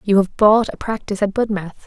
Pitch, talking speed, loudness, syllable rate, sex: 205 Hz, 225 wpm, -18 LUFS, 5.7 syllables/s, female